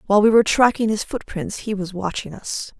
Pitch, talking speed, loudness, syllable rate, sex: 205 Hz, 215 wpm, -20 LUFS, 5.8 syllables/s, female